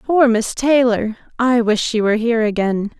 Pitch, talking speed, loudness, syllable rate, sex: 230 Hz, 160 wpm, -17 LUFS, 5.1 syllables/s, female